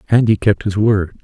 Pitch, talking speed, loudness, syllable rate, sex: 105 Hz, 245 wpm, -15 LUFS, 5.0 syllables/s, male